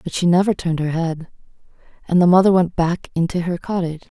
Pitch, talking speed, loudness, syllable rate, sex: 175 Hz, 200 wpm, -18 LUFS, 6.2 syllables/s, female